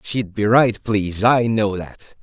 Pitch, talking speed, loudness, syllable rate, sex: 110 Hz, 190 wpm, -18 LUFS, 3.8 syllables/s, male